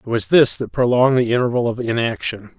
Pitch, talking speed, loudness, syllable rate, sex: 120 Hz, 210 wpm, -17 LUFS, 6.0 syllables/s, male